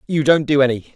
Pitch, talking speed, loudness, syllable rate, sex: 140 Hz, 250 wpm, -16 LUFS, 6.3 syllables/s, male